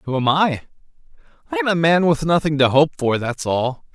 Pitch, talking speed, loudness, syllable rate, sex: 150 Hz, 215 wpm, -18 LUFS, 5.4 syllables/s, male